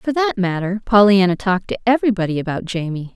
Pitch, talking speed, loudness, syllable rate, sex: 200 Hz, 170 wpm, -17 LUFS, 6.3 syllables/s, female